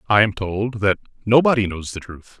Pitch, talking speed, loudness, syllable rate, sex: 105 Hz, 200 wpm, -19 LUFS, 5.2 syllables/s, male